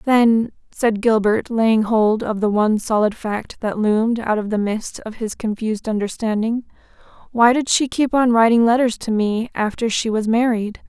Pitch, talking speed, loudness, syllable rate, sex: 220 Hz, 180 wpm, -18 LUFS, 4.7 syllables/s, female